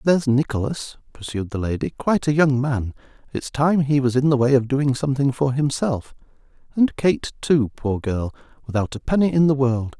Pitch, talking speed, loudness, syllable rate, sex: 135 Hz, 185 wpm, -21 LUFS, 5.2 syllables/s, male